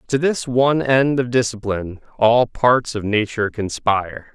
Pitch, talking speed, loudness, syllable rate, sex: 120 Hz, 150 wpm, -18 LUFS, 4.7 syllables/s, male